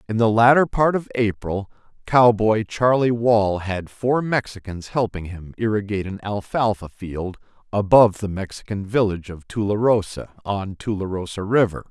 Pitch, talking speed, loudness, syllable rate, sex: 105 Hz, 135 wpm, -21 LUFS, 4.8 syllables/s, male